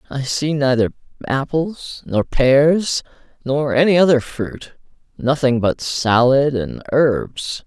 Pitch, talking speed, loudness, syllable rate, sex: 135 Hz, 115 wpm, -17 LUFS, 3.4 syllables/s, male